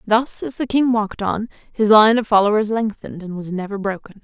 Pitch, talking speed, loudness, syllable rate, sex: 215 Hz, 210 wpm, -18 LUFS, 5.7 syllables/s, female